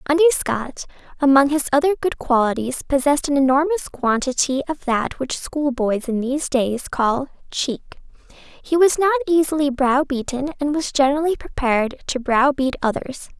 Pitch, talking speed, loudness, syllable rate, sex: 280 Hz, 145 wpm, -20 LUFS, 4.9 syllables/s, female